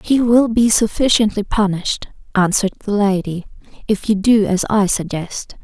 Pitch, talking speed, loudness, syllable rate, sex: 205 Hz, 150 wpm, -16 LUFS, 5.0 syllables/s, female